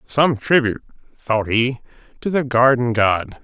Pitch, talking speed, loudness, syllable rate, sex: 125 Hz, 140 wpm, -18 LUFS, 4.2 syllables/s, male